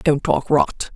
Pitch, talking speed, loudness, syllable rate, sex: 135 Hz, 190 wpm, -19 LUFS, 3.4 syllables/s, female